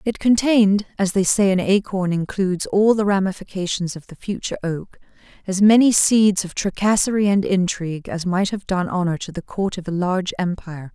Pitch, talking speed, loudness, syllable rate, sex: 190 Hz, 185 wpm, -19 LUFS, 5.4 syllables/s, female